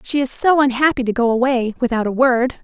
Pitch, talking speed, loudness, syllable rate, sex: 250 Hz, 230 wpm, -17 LUFS, 5.8 syllables/s, female